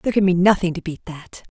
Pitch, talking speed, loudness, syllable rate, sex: 180 Hz, 270 wpm, -19 LUFS, 6.1 syllables/s, female